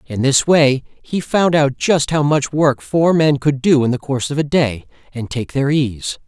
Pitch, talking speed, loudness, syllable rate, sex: 140 Hz, 220 wpm, -16 LUFS, 4.4 syllables/s, male